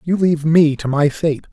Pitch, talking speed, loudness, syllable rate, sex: 155 Hz, 235 wpm, -16 LUFS, 5.0 syllables/s, male